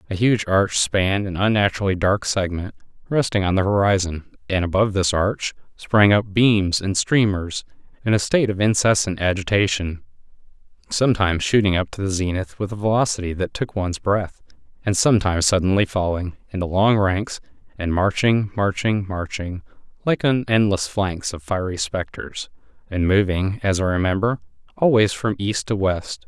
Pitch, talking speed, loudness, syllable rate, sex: 100 Hz, 155 wpm, -20 LUFS, 5.2 syllables/s, male